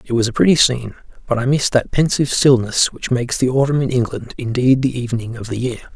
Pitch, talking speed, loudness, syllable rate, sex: 125 Hz, 230 wpm, -17 LUFS, 6.6 syllables/s, male